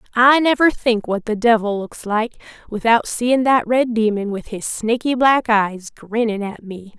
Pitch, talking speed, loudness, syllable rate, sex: 225 Hz, 180 wpm, -18 LUFS, 4.3 syllables/s, female